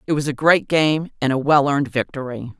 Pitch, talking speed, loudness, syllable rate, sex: 140 Hz, 230 wpm, -19 LUFS, 5.6 syllables/s, female